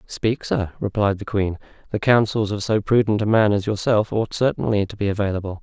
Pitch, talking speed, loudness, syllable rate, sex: 105 Hz, 205 wpm, -21 LUFS, 5.5 syllables/s, male